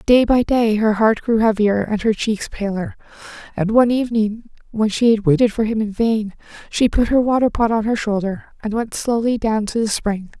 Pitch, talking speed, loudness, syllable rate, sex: 220 Hz, 215 wpm, -18 LUFS, 5.1 syllables/s, female